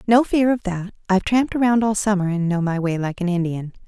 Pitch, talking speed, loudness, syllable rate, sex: 200 Hz, 250 wpm, -20 LUFS, 5.8 syllables/s, female